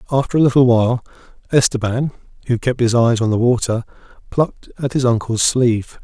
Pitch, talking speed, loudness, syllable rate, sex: 120 Hz, 170 wpm, -17 LUFS, 6.0 syllables/s, male